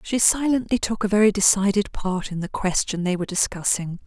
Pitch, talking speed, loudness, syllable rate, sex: 200 Hz, 190 wpm, -21 LUFS, 5.6 syllables/s, female